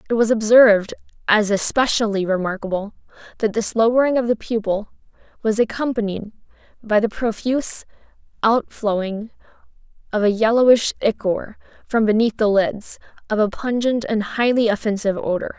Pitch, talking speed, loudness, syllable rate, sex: 220 Hz, 130 wpm, -19 LUFS, 5.1 syllables/s, female